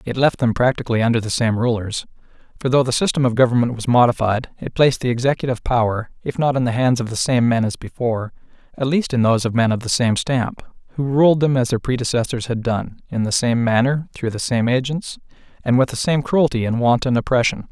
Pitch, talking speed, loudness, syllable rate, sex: 125 Hz, 225 wpm, -19 LUFS, 6.0 syllables/s, male